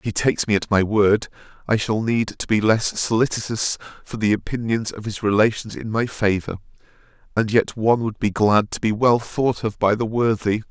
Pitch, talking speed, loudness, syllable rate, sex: 110 Hz, 205 wpm, -20 LUFS, 5.2 syllables/s, male